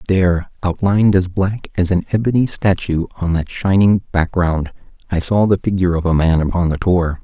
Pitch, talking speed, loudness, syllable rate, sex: 90 Hz, 180 wpm, -17 LUFS, 5.3 syllables/s, male